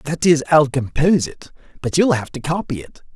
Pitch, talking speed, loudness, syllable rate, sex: 150 Hz, 210 wpm, -18 LUFS, 5.5 syllables/s, male